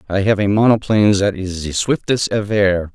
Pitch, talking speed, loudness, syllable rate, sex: 100 Hz, 185 wpm, -16 LUFS, 5.4 syllables/s, male